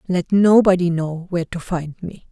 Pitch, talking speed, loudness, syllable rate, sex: 175 Hz, 180 wpm, -18 LUFS, 4.9 syllables/s, female